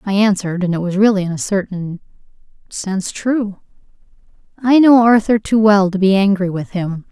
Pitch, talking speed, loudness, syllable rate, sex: 200 Hz, 160 wpm, -15 LUFS, 5.4 syllables/s, female